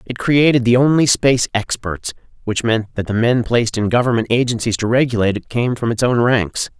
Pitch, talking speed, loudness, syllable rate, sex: 115 Hz, 205 wpm, -16 LUFS, 5.6 syllables/s, male